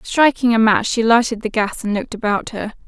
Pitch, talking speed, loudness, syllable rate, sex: 225 Hz, 230 wpm, -17 LUFS, 5.6 syllables/s, female